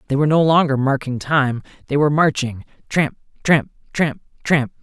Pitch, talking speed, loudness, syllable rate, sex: 140 Hz, 160 wpm, -18 LUFS, 5.2 syllables/s, male